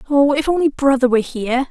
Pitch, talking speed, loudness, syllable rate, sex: 270 Hz, 210 wpm, -16 LUFS, 6.7 syllables/s, female